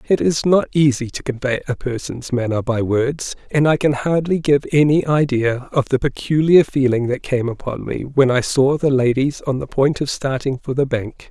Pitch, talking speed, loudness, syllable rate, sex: 135 Hz, 205 wpm, -18 LUFS, 4.8 syllables/s, male